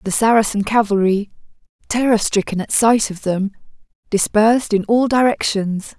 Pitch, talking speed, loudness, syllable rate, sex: 210 Hz, 130 wpm, -17 LUFS, 4.9 syllables/s, female